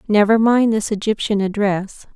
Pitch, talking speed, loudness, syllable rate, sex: 210 Hz, 140 wpm, -17 LUFS, 4.7 syllables/s, female